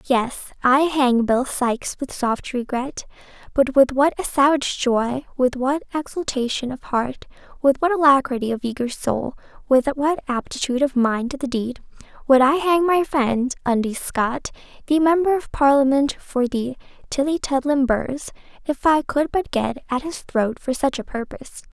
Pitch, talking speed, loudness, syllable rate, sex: 270 Hz, 165 wpm, -21 LUFS, 4.6 syllables/s, female